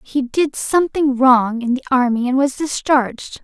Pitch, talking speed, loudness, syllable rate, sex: 265 Hz, 175 wpm, -17 LUFS, 4.6 syllables/s, female